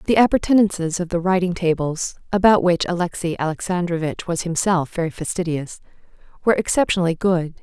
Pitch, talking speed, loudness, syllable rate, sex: 175 Hz, 135 wpm, -20 LUFS, 5.7 syllables/s, female